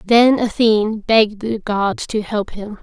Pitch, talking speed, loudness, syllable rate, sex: 215 Hz, 170 wpm, -17 LUFS, 4.1 syllables/s, female